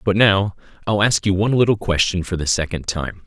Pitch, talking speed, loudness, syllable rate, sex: 100 Hz, 220 wpm, -19 LUFS, 5.6 syllables/s, male